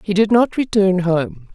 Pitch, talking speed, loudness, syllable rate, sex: 195 Hz, 195 wpm, -16 LUFS, 4.2 syllables/s, female